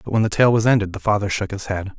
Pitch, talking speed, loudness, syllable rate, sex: 105 Hz, 335 wpm, -19 LUFS, 7.0 syllables/s, male